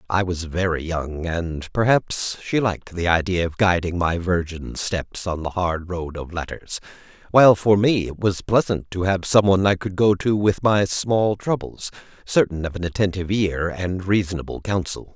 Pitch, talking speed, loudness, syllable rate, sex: 95 Hz, 180 wpm, -21 LUFS, 4.7 syllables/s, male